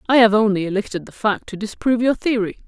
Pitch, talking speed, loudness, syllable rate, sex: 215 Hz, 225 wpm, -19 LUFS, 7.0 syllables/s, female